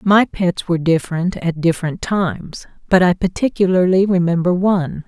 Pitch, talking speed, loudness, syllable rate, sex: 180 Hz, 140 wpm, -17 LUFS, 5.3 syllables/s, female